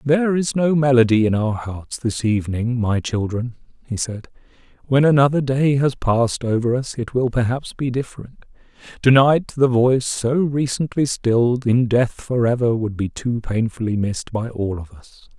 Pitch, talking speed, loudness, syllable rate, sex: 120 Hz, 170 wpm, -19 LUFS, 4.9 syllables/s, male